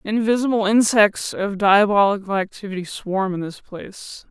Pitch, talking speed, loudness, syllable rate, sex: 200 Hz, 125 wpm, -19 LUFS, 4.8 syllables/s, female